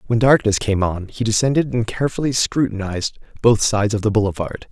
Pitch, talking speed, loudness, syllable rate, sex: 110 Hz, 180 wpm, -19 LUFS, 6.0 syllables/s, male